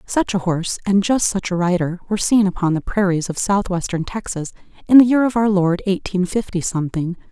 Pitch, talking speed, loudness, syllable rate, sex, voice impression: 190 Hz, 205 wpm, -18 LUFS, 5.7 syllables/s, female, feminine, adult-like, slightly middle-aged, thin, slightly tensed, slightly weak, slightly dark, slightly soft, clear, fluent, slightly cute, intellectual, slightly refreshing, slightly sincere, calm, slightly reassuring, slightly unique, elegant, slightly sweet, slightly lively, kind, slightly modest